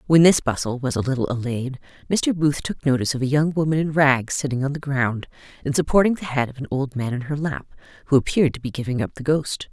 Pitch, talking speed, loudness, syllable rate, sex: 140 Hz, 245 wpm, -22 LUFS, 6.2 syllables/s, female